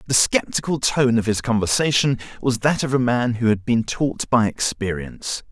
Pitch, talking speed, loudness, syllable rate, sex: 125 Hz, 185 wpm, -20 LUFS, 5.0 syllables/s, male